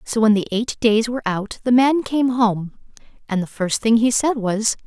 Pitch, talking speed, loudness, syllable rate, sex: 225 Hz, 220 wpm, -19 LUFS, 4.7 syllables/s, female